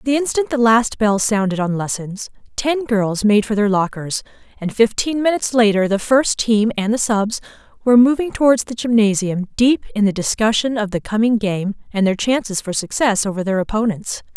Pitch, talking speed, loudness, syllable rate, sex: 220 Hz, 190 wpm, -17 LUFS, 5.2 syllables/s, female